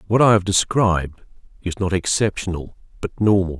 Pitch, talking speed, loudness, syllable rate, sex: 95 Hz, 150 wpm, -19 LUFS, 5.4 syllables/s, male